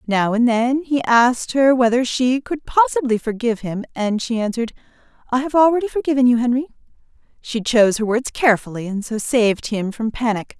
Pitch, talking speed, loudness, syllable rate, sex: 240 Hz, 180 wpm, -18 LUFS, 5.7 syllables/s, female